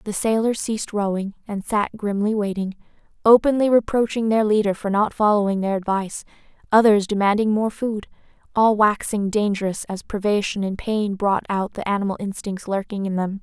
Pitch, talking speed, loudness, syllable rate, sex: 205 Hz, 160 wpm, -21 LUFS, 5.2 syllables/s, female